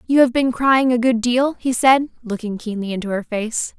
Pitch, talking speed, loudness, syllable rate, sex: 240 Hz, 220 wpm, -18 LUFS, 4.9 syllables/s, female